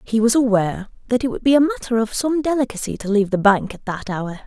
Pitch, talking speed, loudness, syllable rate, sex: 230 Hz, 255 wpm, -19 LUFS, 6.4 syllables/s, female